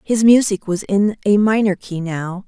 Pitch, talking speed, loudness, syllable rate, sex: 200 Hz, 195 wpm, -17 LUFS, 4.4 syllables/s, female